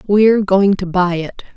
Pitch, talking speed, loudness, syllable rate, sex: 190 Hz, 190 wpm, -14 LUFS, 4.6 syllables/s, female